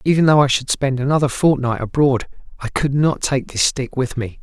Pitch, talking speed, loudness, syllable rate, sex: 135 Hz, 215 wpm, -18 LUFS, 5.2 syllables/s, male